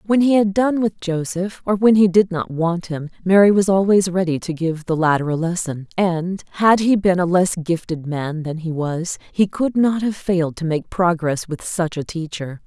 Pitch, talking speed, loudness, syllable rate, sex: 180 Hz, 220 wpm, -19 LUFS, 4.7 syllables/s, female